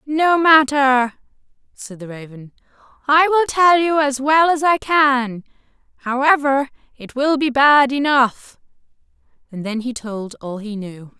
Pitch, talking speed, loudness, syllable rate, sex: 265 Hz, 145 wpm, -16 LUFS, 3.9 syllables/s, female